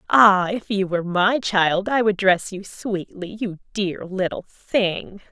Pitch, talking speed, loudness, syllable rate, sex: 195 Hz, 170 wpm, -21 LUFS, 3.7 syllables/s, female